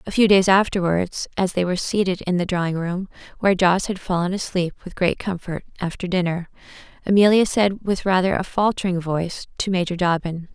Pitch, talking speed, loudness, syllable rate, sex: 185 Hz, 180 wpm, -21 LUFS, 5.6 syllables/s, female